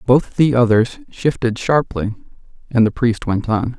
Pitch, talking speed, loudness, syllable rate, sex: 115 Hz, 160 wpm, -17 LUFS, 4.2 syllables/s, male